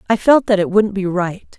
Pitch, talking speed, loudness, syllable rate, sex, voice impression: 200 Hz, 265 wpm, -16 LUFS, 5.0 syllables/s, female, feminine, adult-like, slightly sincere, reassuring, slightly elegant